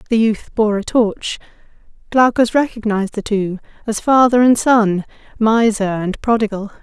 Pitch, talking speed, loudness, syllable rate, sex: 220 Hz, 130 wpm, -16 LUFS, 4.7 syllables/s, female